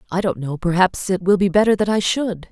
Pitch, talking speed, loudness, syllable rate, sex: 190 Hz, 265 wpm, -18 LUFS, 5.7 syllables/s, female